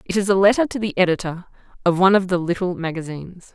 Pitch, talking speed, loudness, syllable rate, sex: 185 Hz, 220 wpm, -19 LUFS, 6.8 syllables/s, female